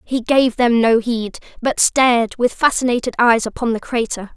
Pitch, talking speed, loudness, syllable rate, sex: 240 Hz, 180 wpm, -16 LUFS, 4.8 syllables/s, female